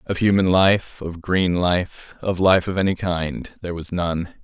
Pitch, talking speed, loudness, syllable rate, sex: 90 Hz, 190 wpm, -20 LUFS, 4.1 syllables/s, male